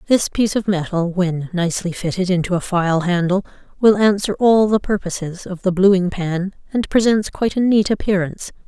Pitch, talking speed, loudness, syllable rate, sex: 190 Hz, 180 wpm, -18 LUFS, 5.2 syllables/s, female